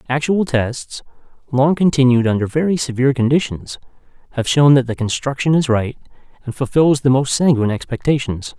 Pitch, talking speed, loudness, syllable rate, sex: 135 Hz, 145 wpm, -16 LUFS, 5.5 syllables/s, male